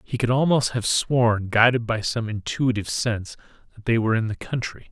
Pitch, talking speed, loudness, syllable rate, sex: 115 Hz, 195 wpm, -22 LUFS, 5.5 syllables/s, male